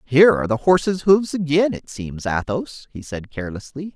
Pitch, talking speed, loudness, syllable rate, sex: 145 Hz, 180 wpm, -19 LUFS, 5.2 syllables/s, male